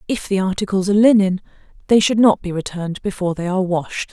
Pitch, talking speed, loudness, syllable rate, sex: 195 Hz, 205 wpm, -18 LUFS, 6.7 syllables/s, female